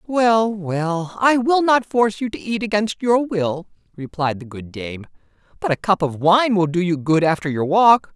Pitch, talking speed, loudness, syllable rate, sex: 190 Hz, 205 wpm, -19 LUFS, 4.5 syllables/s, male